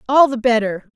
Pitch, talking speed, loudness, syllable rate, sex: 240 Hz, 190 wpm, -16 LUFS, 5.4 syllables/s, female